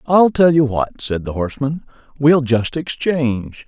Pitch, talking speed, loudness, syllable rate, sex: 135 Hz, 165 wpm, -17 LUFS, 4.5 syllables/s, male